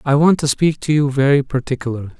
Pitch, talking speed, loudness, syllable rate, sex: 140 Hz, 220 wpm, -17 LUFS, 6.4 syllables/s, male